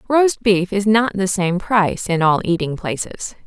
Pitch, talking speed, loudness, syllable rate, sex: 195 Hz, 190 wpm, -18 LUFS, 4.4 syllables/s, female